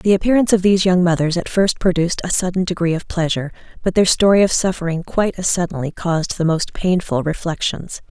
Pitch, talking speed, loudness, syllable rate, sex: 175 Hz, 200 wpm, -17 LUFS, 6.3 syllables/s, female